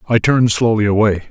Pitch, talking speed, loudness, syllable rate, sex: 110 Hz, 185 wpm, -14 LUFS, 6.8 syllables/s, male